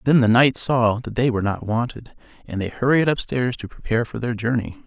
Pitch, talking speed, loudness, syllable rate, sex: 120 Hz, 220 wpm, -21 LUFS, 5.6 syllables/s, male